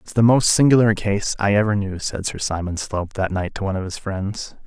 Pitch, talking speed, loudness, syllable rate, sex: 100 Hz, 245 wpm, -20 LUFS, 5.5 syllables/s, male